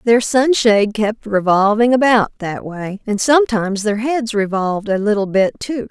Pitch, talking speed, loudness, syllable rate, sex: 220 Hz, 165 wpm, -16 LUFS, 4.8 syllables/s, female